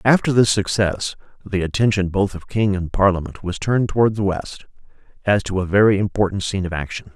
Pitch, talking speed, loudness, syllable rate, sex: 100 Hz, 195 wpm, -19 LUFS, 5.8 syllables/s, male